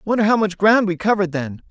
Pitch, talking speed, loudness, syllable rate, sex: 195 Hz, 245 wpm, -18 LUFS, 6.5 syllables/s, male